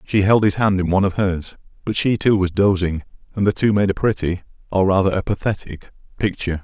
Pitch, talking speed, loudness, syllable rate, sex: 95 Hz, 215 wpm, -19 LUFS, 5.9 syllables/s, male